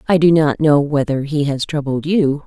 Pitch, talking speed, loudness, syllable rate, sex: 150 Hz, 220 wpm, -16 LUFS, 4.8 syllables/s, female